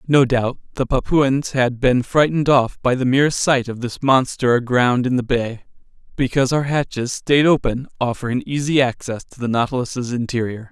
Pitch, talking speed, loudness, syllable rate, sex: 130 Hz, 175 wpm, -19 LUFS, 5.0 syllables/s, male